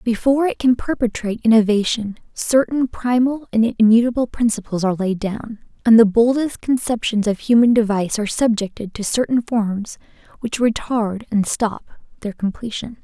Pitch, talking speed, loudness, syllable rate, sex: 225 Hz, 145 wpm, -18 LUFS, 5.2 syllables/s, female